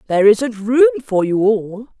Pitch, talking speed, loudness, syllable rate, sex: 230 Hz, 180 wpm, -15 LUFS, 4.6 syllables/s, female